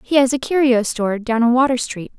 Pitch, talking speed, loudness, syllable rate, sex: 245 Hz, 245 wpm, -17 LUFS, 5.8 syllables/s, female